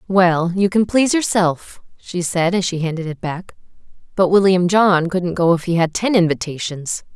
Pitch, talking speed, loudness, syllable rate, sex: 180 Hz, 185 wpm, -17 LUFS, 4.8 syllables/s, female